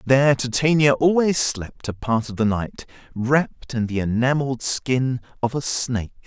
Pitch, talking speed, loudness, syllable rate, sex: 125 Hz, 165 wpm, -21 LUFS, 4.7 syllables/s, male